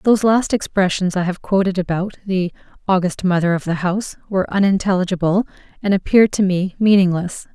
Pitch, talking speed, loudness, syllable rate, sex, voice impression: 190 Hz, 160 wpm, -18 LUFS, 5.9 syllables/s, female, feminine, adult-like, slightly relaxed, weak, bright, soft, fluent, intellectual, calm, friendly, reassuring, elegant, lively, kind, modest